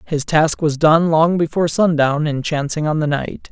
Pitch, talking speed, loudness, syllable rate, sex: 155 Hz, 205 wpm, -17 LUFS, 4.7 syllables/s, male